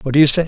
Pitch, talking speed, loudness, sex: 145 Hz, 510 wpm, -13 LUFS, male